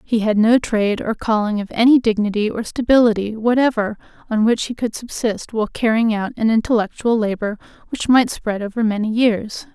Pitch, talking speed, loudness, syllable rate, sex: 220 Hz, 180 wpm, -18 LUFS, 5.4 syllables/s, female